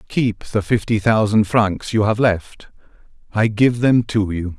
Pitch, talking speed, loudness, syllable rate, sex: 105 Hz, 155 wpm, -18 LUFS, 4.0 syllables/s, male